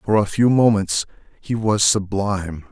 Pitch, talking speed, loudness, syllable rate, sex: 100 Hz, 155 wpm, -19 LUFS, 4.5 syllables/s, male